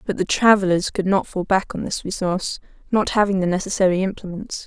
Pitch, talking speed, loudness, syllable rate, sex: 190 Hz, 195 wpm, -20 LUFS, 5.9 syllables/s, female